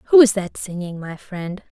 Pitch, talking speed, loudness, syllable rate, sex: 195 Hz, 165 wpm, -20 LUFS, 4.2 syllables/s, female